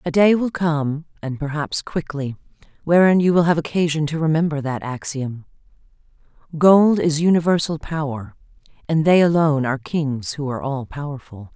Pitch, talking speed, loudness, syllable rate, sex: 150 Hz, 145 wpm, -19 LUFS, 5.1 syllables/s, female